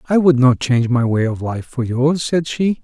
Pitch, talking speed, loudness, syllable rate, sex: 135 Hz, 255 wpm, -17 LUFS, 4.8 syllables/s, male